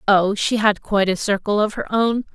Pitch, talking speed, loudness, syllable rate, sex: 205 Hz, 230 wpm, -19 LUFS, 5.3 syllables/s, female